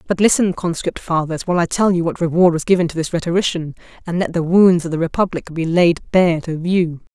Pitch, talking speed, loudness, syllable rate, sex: 170 Hz, 225 wpm, -17 LUFS, 5.8 syllables/s, female